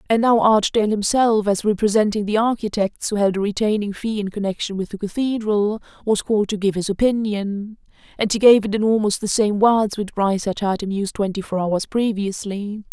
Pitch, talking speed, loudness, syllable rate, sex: 210 Hz, 195 wpm, -20 LUFS, 5.5 syllables/s, female